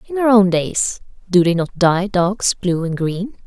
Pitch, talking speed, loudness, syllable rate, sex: 190 Hz, 210 wpm, -17 LUFS, 3.9 syllables/s, female